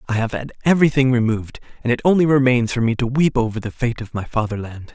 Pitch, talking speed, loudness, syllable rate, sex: 120 Hz, 230 wpm, -19 LUFS, 6.6 syllables/s, male